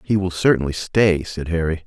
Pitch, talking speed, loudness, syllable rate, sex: 90 Hz, 195 wpm, -19 LUFS, 5.1 syllables/s, male